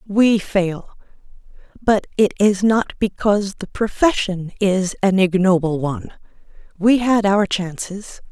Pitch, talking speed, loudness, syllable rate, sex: 200 Hz, 125 wpm, -18 LUFS, 4.0 syllables/s, female